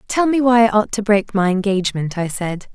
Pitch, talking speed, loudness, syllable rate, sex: 210 Hz, 240 wpm, -17 LUFS, 5.5 syllables/s, female